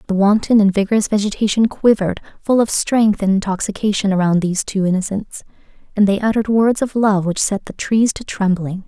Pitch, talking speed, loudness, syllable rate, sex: 205 Hz, 185 wpm, -17 LUFS, 5.8 syllables/s, female